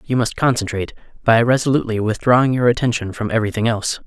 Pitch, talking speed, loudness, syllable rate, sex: 115 Hz, 160 wpm, -18 LUFS, 7.1 syllables/s, male